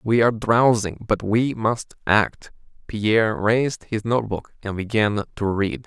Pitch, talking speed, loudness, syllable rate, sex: 110 Hz, 155 wpm, -21 LUFS, 4.3 syllables/s, male